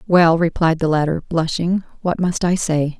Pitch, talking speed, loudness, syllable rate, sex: 165 Hz, 180 wpm, -18 LUFS, 4.6 syllables/s, female